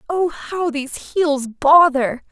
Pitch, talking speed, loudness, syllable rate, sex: 300 Hz, 130 wpm, -17 LUFS, 3.7 syllables/s, female